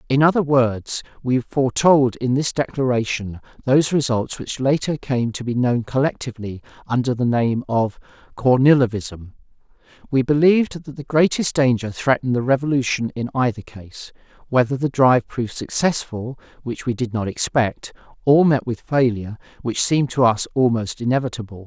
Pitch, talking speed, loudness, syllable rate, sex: 125 Hz, 145 wpm, -20 LUFS, 5.2 syllables/s, male